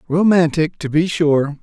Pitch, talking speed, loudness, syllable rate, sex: 160 Hz, 145 wpm, -16 LUFS, 4.1 syllables/s, male